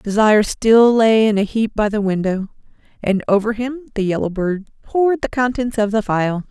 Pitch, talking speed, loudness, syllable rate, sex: 215 Hz, 195 wpm, -17 LUFS, 5.0 syllables/s, female